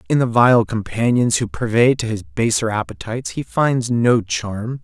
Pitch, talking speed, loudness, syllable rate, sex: 115 Hz, 175 wpm, -18 LUFS, 4.5 syllables/s, male